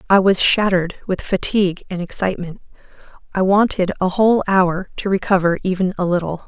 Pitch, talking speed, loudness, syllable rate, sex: 185 Hz, 160 wpm, -18 LUFS, 5.8 syllables/s, female